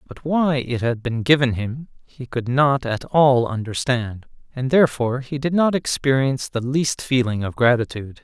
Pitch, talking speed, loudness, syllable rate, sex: 130 Hz, 175 wpm, -20 LUFS, 4.8 syllables/s, male